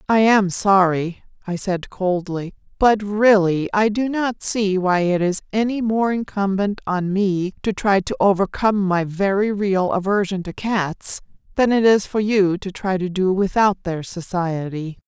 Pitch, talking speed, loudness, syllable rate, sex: 195 Hz, 165 wpm, -19 LUFS, 4.2 syllables/s, female